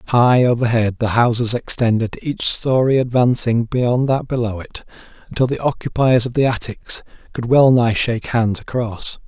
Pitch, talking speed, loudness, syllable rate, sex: 120 Hz, 155 wpm, -17 LUFS, 4.6 syllables/s, male